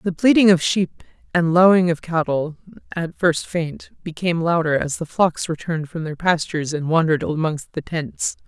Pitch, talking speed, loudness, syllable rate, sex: 165 Hz, 175 wpm, -20 LUFS, 5.0 syllables/s, female